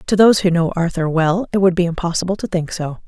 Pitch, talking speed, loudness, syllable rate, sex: 175 Hz, 255 wpm, -17 LUFS, 6.3 syllables/s, female